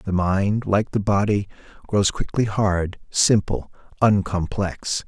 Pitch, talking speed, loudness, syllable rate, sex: 100 Hz, 120 wpm, -21 LUFS, 3.6 syllables/s, male